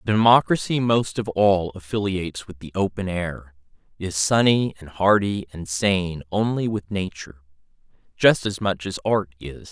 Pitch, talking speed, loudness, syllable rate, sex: 95 Hz, 140 wpm, -22 LUFS, 4.4 syllables/s, male